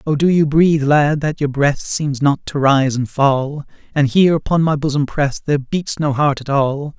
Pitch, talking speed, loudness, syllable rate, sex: 145 Hz, 225 wpm, -16 LUFS, 4.8 syllables/s, male